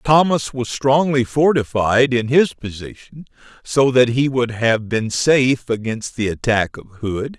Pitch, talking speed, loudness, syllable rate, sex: 125 Hz, 155 wpm, -17 LUFS, 4.2 syllables/s, male